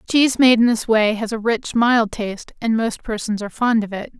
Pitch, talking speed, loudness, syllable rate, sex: 225 Hz, 245 wpm, -18 LUFS, 5.4 syllables/s, female